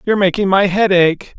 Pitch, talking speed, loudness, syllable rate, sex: 190 Hz, 215 wpm, -14 LUFS, 5.6 syllables/s, male